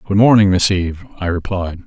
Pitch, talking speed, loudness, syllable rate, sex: 95 Hz, 195 wpm, -15 LUFS, 5.9 syllables/s, male